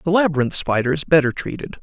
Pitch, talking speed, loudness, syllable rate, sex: 150 Hz, 195 wpm, -19 LUFS, 6.5 syllables/s, male